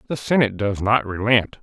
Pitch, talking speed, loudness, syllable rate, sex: 110 Hz, 185 wpm, -20 LUFS, 5.6 syllables/s, male